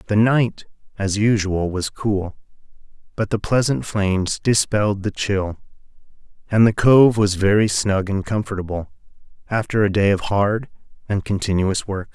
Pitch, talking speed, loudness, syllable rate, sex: 100 Hz, 145 wpm, -19 LUFS, 4.5 syllables/s, male